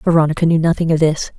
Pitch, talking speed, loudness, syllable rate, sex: 160 Hz, 215 wpm, -15 LUFS, 6.8 syllables/s, female